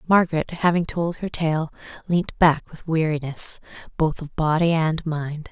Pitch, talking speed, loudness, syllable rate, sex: 160 Hz, 150 wpm, -22 LUFS, 4.4 syllables/s, female